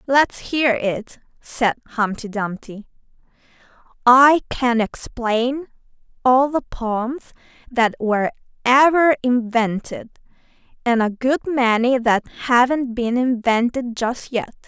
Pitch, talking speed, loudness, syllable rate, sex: 240 Hz, 100 wpm, -19 LUFS, 3.6 syllables/s, female